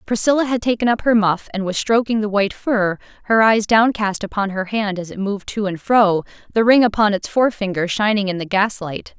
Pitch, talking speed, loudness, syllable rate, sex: 210 Hz, 215 wpm, -18 LUFS, 5.6 syllables/s, female